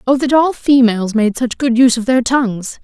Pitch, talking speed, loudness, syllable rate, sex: 245 Hz, 235 wpm, -13 LUFS, 5.6 syllables/s, female